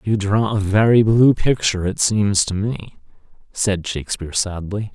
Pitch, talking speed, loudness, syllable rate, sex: 100 Hz, 160 wpm, -18 LUFS, 4.6 syllables/s, male